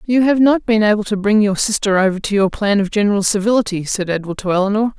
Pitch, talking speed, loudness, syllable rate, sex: 205 Hz, 240 wpm, -16 LUFS, 6.4 syllables/s, female